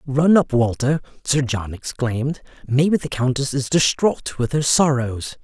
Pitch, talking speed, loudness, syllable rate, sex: 135 Hz, 155 wpm, -20 LUFS, 4.3 syllables/s, male